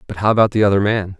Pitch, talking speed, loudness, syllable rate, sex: 100 Hz, 300 wpm, -16 LUFS, 7.8 syllables/s, male